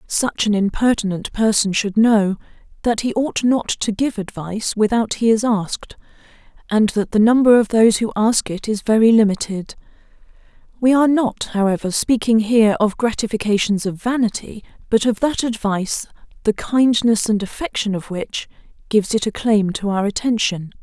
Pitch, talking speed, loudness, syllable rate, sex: 220 Hz, 160 wpm, -18 LUFS, 5.1 syllables/s, female